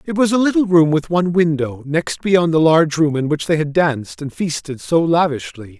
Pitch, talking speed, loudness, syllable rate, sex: 160 Hz, 230 wpm, -17 LUFS, 5.3 syllables/s, male